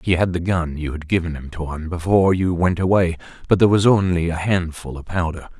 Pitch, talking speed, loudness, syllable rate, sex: 85 Hz, 225 wpm, -20 LUFS, 5.9 syllables/s, male